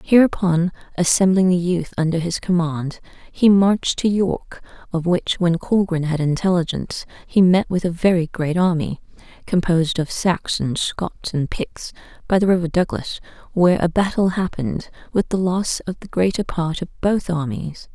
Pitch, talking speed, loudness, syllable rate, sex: 175 Hz, 160 wpm, -20 LUFS, 4.8 syllables/s, female